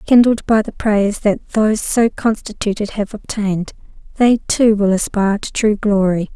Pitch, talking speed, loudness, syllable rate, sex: 210 Hz, 160 wpm, -16 LUFS, 4.9 syllables/s, female